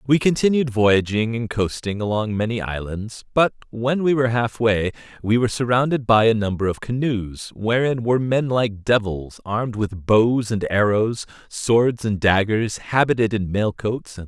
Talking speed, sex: 170 wpm, male